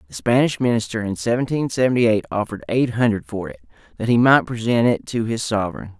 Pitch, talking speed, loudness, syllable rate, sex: 115 Hz, 200 wpm, -20 LUFS, 6.2 syllables/s, male